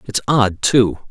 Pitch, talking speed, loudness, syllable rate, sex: 110 Hz, 165 wpm, -16 LUFS, 3.8 syllables/s, male